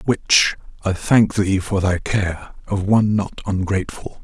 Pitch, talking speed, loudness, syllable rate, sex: 100 Hz, 155 wpm, -19 LUFS, 4.1 syllables/s, male